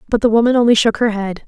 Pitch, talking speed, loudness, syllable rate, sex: 225 Hz, 285 wpm, -14 LUFS, 7.0 syllables/s, female